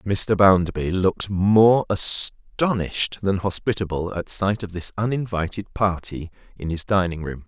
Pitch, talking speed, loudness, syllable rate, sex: 95 Hz, 135 wpm, -21 LUFS, 4.4 syllables/s, male